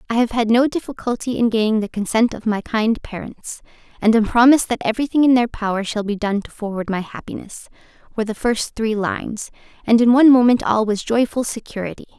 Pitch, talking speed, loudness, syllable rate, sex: 225 Hz, 200 wpm, -18 LUFS, 6.0 syllables/s, female